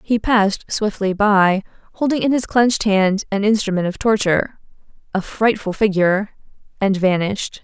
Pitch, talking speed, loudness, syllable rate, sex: 205 Hz, 125 wpm, -18 LUFS, 5.1 syllables/s, female